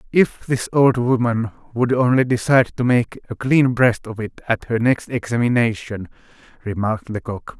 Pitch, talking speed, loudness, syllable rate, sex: 120 Hz, 160 wpm, -19 LUFS, 4.9 syllables/s, male